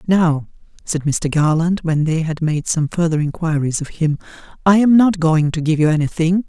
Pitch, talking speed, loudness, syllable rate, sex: 160 Hz, 195 wpm, -17 LUFS, 4.9 syllables/s, male